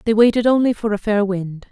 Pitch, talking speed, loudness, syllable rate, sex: 215 Hz, 245 wpm, -17 LUFS, 5.8 syllables/s, female